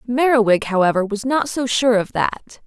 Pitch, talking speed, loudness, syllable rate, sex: 235 Hz, 180 wpm, -18 LUFS, 4.9 syllables/s, female